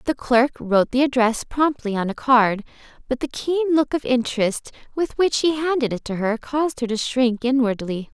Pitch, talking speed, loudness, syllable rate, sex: 250 Hz, 200 wpm, -21 LUFS, 4.9 syllables/s, female